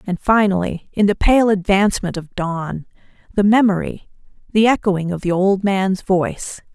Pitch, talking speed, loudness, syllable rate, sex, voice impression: 195 Hz, 150 wpm, -17 LUFS, 4.7 syllables/s, female, feminine, slightly gender-neutral, adult-like, slightly middle-aged, slightly thin, tensed, slightly powerful, bright, slightly soft, clear, fluent, cool, intellectual, slightly refreshing, sincere, calm, friendly, slightly reassuring, unique, slightly elegant, lively, slightly strict, slightly intense